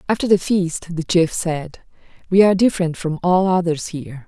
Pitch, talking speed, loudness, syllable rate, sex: 175 Hz, 180 wpm, -18 LUFS, 5.4 syllables/s, female